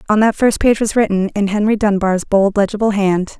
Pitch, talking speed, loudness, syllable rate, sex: 205 Hz, 210 wpm, -15 LUFS, 5.3 syllables/s, female